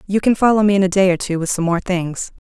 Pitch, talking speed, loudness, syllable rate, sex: 190 Hz, 310 wpm, -17 LUFS, 6.3 syllables/s, female